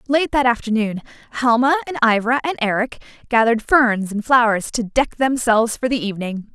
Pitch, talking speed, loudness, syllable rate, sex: 235 Hz, 165 wpm, -18 LUFS, 5.4 syllables/s, female